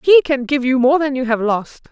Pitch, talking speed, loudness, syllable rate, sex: 265 Hz, 285 wpm, -16 LUFS, 5.0 syllables/s, female